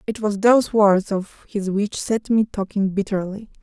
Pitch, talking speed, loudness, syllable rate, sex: 205 Hz, 180 wpm, -20 LUFS, 4.6 syllables/s, female